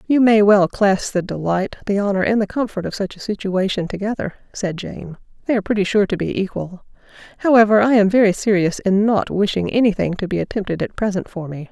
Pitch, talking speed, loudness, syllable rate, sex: 200 Hz, 215 wpm, -18 LUFS, 5.9 syllables/s, female